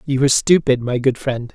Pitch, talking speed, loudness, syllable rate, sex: 130 Hz, 235 wpm, -17 LUFS, 5.5 syllables/s, male